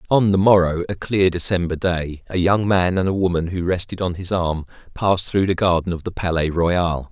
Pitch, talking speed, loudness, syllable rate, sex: 90 Hz, 220 wpm, -20 LUFS, 5.3 syllables/s, male